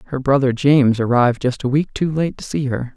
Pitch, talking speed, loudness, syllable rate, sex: 135 Hz, 245 wpm, -17 LUFS, 5.9 syllables/s, male